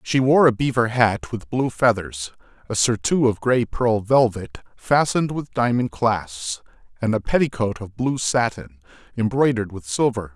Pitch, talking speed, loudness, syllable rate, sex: 115 Hz, 155 wpm, -21 LUFS, 4.6 syllables/s, male